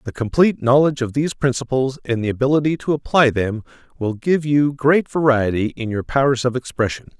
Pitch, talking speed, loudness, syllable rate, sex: 130 Hz, 185 wpm, -19 LUFS, 5.7 syllables/s, male